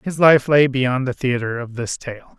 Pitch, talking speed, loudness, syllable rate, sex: 130 Hz, 225 wpm, -18 LUFS, 4.4 syllables/s, male